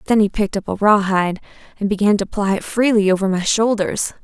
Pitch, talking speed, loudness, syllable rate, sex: 205 Hz, 215 wpm, -17 LUFS, 6.2 syllables/s, female